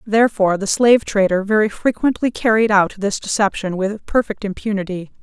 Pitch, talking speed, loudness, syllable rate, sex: 205 Hz, 150 wpm, -17 LUFS, 5.6 syllables/s, female